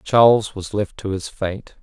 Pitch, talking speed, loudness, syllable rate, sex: 100 Hz, 195 wpm, -20 LUFS, 4.1 syllables/s, male